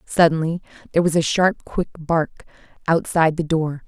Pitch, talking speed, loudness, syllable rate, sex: 160 Hz, 155 wpm, -20 LUFS, 5.5 syllables/s, female